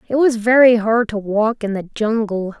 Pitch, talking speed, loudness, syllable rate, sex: 225 Hz, 210 wpm, -16 LUFS, 4.6 syllables/s, female